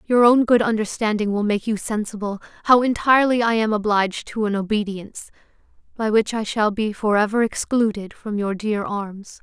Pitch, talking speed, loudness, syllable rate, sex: 215 Hz, 180 wpm, -20 LUFS, 5.2 syllables/s, female